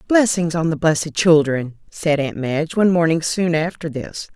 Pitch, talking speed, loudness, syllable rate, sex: 160 Hz, 180 wpm, -18 LUFS, 5.0 syllables/s, female